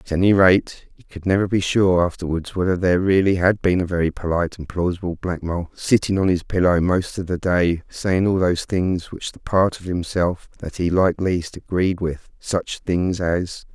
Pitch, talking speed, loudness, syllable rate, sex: 90 Hz, 205 wpm, -20 LUFS, 4.9 syllables/s, male